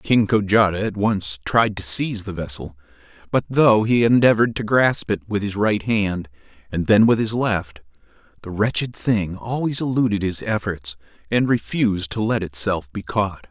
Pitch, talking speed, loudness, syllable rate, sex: 105 Hz, 175 wpm, -20 LUFS, 4.7 syllables/s, male